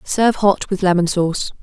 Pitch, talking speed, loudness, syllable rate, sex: 190 Hz, 185 wpm, -17 LUFS, 5.6 syllables/s, female